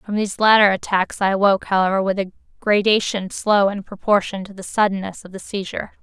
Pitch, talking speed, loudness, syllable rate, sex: 195 Hz, 190 wpm, -19 LUFS, 6.1 syllables/s, female